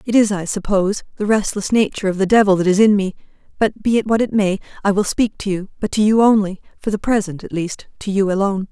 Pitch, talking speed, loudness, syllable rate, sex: 200 Hz, 255 wpm, -18 LUFS, 6.3 syllables/s, female